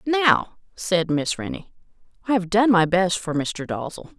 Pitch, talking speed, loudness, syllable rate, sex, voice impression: 190 Hz, 170 wpm, -21 LUFS, 4.3 syllables/s, female, feminine, adult-like, slightly powerful, slightly hard, clear, fluent, intellectual, slightly calm, elegant, lively, slightly strict